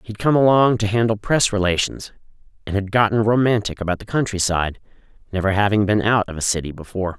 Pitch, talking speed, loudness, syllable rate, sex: 105 Hz, 185 wpm, -19 LUFS, 6.3 syllables/s, male